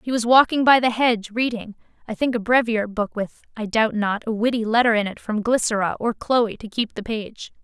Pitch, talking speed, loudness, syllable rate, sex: 225 Hz, 230 wpm, -21 LUFS, 5.3 syllables/s, female